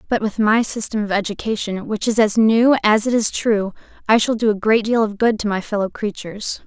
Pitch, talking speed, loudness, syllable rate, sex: 215 Hz, 235 wpm, -18 LUFS, 5.5 syllables/s, female